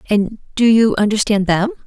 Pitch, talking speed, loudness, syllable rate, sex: 215 Hz, 160 wpm, -15 LUFS, 5.2 syllables/s, female